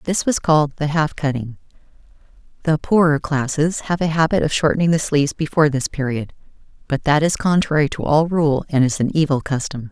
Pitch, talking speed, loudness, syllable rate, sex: 150 Hz, 190 wpm, -18 LUFS, 5.7 syllables/s, female